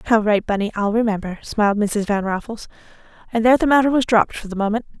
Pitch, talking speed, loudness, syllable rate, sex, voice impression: 215 Hz, 215 wpm, -19 LUFS, 6.8 syllables/s, female, feminine, adult-like, slightly relaxed, powerful, slightly bright, fluent, raspy, intellectual, elegant, lively, slightly strict, intense, sharp